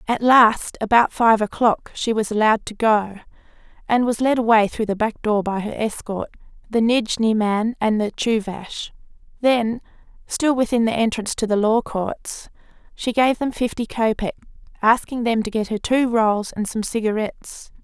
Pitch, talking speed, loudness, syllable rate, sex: 225 Hz, 170 wpm, -20 LUFS, 4.7 syllables/s, female